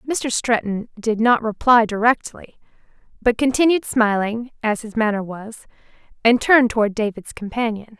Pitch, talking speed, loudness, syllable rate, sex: 225 Hz, 135 wpm, -19 LUFS, 4.8 syllables/s, female